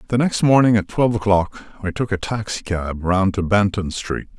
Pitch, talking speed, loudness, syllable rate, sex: 100 Hz, 205 wpm, -19 LUFS, 5.2 syllables/s, male